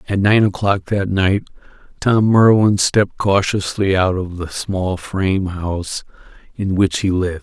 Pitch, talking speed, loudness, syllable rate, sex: 95 Hz, 155 wpm, -17 LUFS, 4.4 syllables/s, male